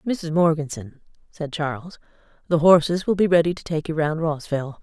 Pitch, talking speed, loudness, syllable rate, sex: 160 Hz, 175 wpm, -21 LUFS, 5.4 syllables/s, female